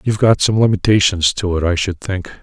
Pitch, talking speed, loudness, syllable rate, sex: 95 Hz, 225 wpm, -15 LUFS, 5.9 syllables/s, male